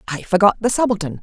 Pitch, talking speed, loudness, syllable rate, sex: 195 Hz, 195 wpm, -17 LUFS, 7.0 syllables/s, female